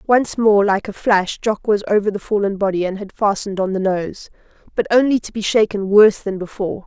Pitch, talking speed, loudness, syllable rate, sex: 205 Hz, 210 wpm, -18 LUFS, 5.6 syllables/s, female